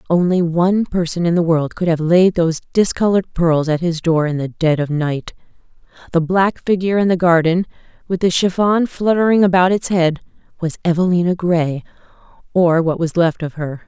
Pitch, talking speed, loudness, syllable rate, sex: 175 Hz, 175 wpm, -16 LUFS, 5.3 syllables/s, female